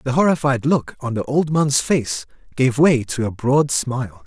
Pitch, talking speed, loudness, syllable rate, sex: 130 Hz, 195 wpm, -19 LUFS, 4.5 syllables/s, male